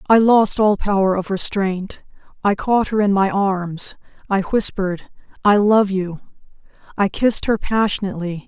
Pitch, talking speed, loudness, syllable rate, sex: 200 Hz, 150 wpm, -18 LUFS, 4.6 syllables/s, female